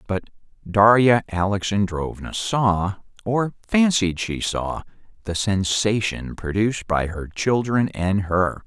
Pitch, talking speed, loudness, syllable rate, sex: 100 Hz, 110 wpm, -21 LUFS, 3.8 syllables/s, male